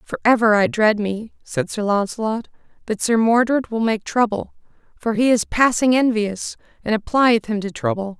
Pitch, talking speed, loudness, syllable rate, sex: 225 Hz, 175 wpm, -19 LUFS, 4.8 syllables/s, female